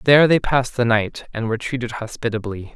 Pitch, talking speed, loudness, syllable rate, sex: 120 Hz, 195 wpm, -20 LUFS, 6.1 syllables/s, male